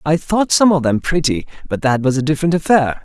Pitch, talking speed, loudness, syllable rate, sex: 150 Hz, 215 wpm, -16 LUFS, 5.9 syllables/s, male